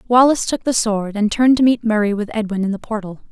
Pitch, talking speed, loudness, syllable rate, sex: 220 Hz, 255 wpm, -17 LUFS, 6.5 syllables/s, female